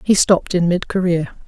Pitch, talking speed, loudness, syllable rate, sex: 180 Hz, 205 wpm, -17 LUFS, 5.4 syllables/s, female